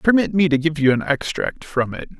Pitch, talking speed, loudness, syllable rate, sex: 160 Hz, 245 wpm, -19 LUFS, 5.4 syllables/s, male